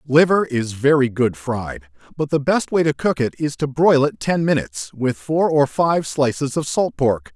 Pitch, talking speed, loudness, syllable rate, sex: 140 Hz, 210 wpm, -19 LUFS, 4.6 syllables/s, male